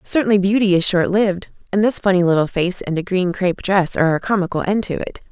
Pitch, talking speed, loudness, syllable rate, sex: 190 Hz, 225 wpm, -18 LUFS, 6.3 syllables/s, female